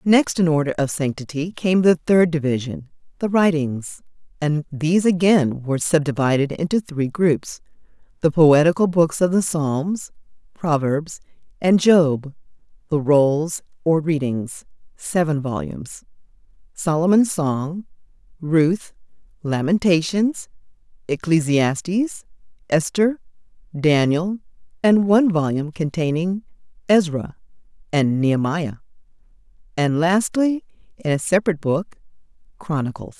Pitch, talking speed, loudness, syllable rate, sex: 165 Hz, 100 wpm, -20 LUFS, 4.7 syllables/s, female